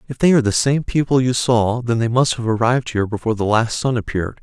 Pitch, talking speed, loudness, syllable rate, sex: 120 Hz, 255 wpm, -18 LUFS, 6.6 syllables/s, male